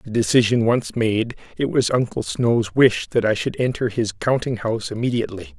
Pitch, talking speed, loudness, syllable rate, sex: 115 Hz, 185 wpm, -20 LUFS, 5.1 syllables/s, male